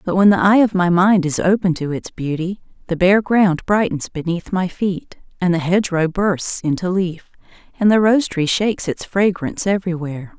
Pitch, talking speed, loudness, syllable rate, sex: 180 Hz, 195 wpm, -18 LUFS, 5.3 syllables/s, female